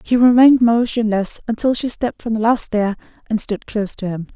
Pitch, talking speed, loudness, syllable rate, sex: 225 Hz, 205 wpm, -17 LUFS, 5.7 syllables/s, female